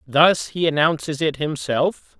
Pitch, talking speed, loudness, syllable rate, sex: 155 Hz, 135 wpm, -20 LUFS, 3.9 syllables/s, male